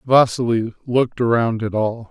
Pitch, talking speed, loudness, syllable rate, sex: 115 Hz, 145 wpm, -19 LUFS, 4.9 syllables/s, male